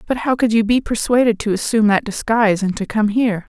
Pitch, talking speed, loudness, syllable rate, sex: 220 Hz, 235 wpm, -17 LUFS, 6.3 syllables/s, female